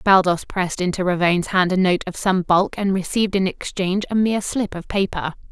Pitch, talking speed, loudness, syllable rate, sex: 185 Hz, 205 wpm, -20 LUFS, 5.8 syllables/s, female